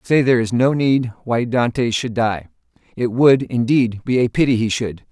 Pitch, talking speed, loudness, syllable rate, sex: 120 Hz, 200 wpm, -18 LUFS, 4.7 syllables/s, male